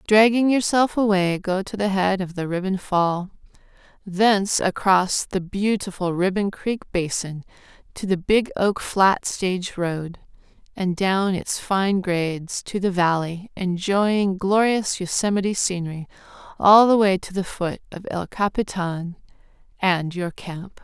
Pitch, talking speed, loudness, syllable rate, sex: 190 Hz, 140 wpm, -21 LUFS, 4.1 syllables/s, female